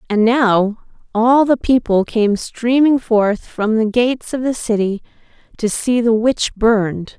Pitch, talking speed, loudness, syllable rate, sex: 230 Hz, 160 wpm, -16 LUFS, 3.9 syllables/s, female